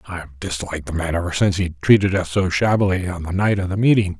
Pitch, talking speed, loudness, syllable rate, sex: 90 Hz, 255 wpm, -19 LUFS, 6.6 syllables/s, male